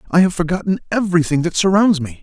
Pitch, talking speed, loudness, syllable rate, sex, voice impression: 175 Hz, 190 wpm, -16 LUFS, 6.8 syllables/s, male, very masculine, old, very thick, slightly tensed, slightly powerful, slightly dark, soft, muffled, fluent, raspy, cool, intellectual, slightly refreshing, sincere, calm, friendly, reassuring, very unique, slightly elegant, very wild, lively, slightly strict, intense